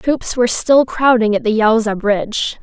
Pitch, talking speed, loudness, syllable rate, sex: 225 Hz, 185 wpm, -15 LUFS, 4.7 syllables/s, female